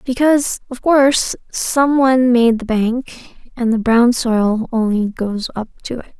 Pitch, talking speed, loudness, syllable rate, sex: 240 Hz, 165 wpm, -16 LUFS, 4.0 syllables/s, female